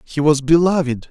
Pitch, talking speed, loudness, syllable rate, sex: 150 Hz, 165 wpm, -16 LUFS, 5.0 syllables/s, male